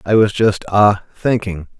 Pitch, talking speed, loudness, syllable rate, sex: 100 Hz, 100 wpm, -15 LUFS, 4.2 syllables/s, male